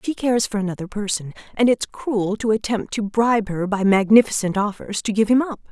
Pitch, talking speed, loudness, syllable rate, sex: 215 Hz, 210 wpm, -20 LUFS, 5.7 syllables/s, female